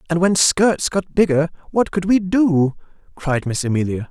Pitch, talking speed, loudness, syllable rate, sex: 170 Hz, 175 wpm, -18 LUFS, 4.6 syllables/s, male